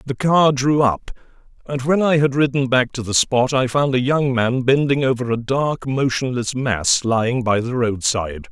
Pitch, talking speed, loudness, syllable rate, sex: 130 Hz, 195 wpm, -18 LUFS, 4.6 syllables/s, male